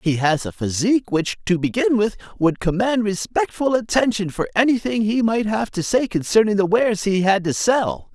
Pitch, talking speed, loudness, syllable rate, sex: 210 Hz, 190 wpm, -20 LUFS, 5.1 syllables/s, male